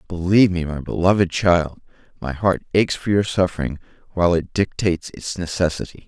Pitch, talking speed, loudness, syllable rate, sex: 90 Hz, 160 wpm, -20 LUFS, 5.7 syllables/s, male